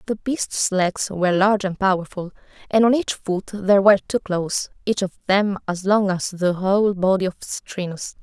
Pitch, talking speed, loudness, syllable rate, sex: 195 Hz, 190 wpm, -20 LUFS, 5.0 syllables/s, female